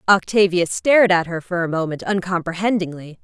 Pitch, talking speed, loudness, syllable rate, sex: 180 Hz, 150 wpm, -19 LUFS, 5.5 syllables/s, female